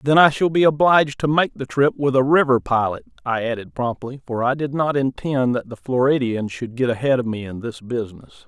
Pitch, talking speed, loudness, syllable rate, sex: 130 Hz, 225 wpm, -20 LUFS, 5.4 syllables/s, male